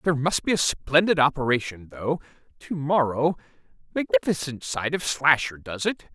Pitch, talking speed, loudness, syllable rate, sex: 145 Hz, 135 wpm, -24 LUFS, 4.9 syllables/s, male